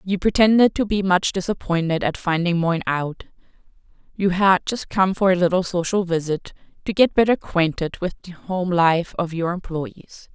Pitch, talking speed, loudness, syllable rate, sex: 180 Hz, 170 wpm, -20 LUFS, 4.9 syllables/s, female